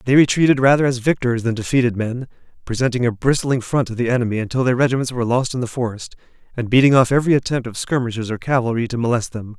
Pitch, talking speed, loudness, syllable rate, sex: 125 Hz, 220 wpm, -18 LUFS, 6.9 syllables/s, male